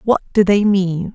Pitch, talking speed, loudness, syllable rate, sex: 195 Hz, 210 wpm, -15 LUFS, 4.3 syllables/s, female